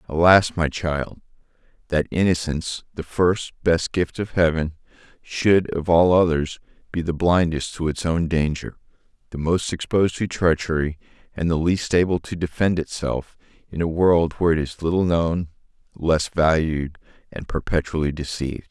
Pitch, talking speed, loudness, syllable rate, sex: 80 Hz, 140 wpm, -22 LUFS, 4.7 syllables/s, male